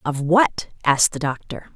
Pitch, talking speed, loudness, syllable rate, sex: 155 Hz, 170 wpm, -19 LUFS, 4.7 syllables/s, female